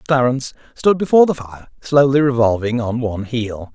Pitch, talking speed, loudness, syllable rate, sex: 125 Hz, 160 wpm, -17 LUFS, 5.5 syllables/s, male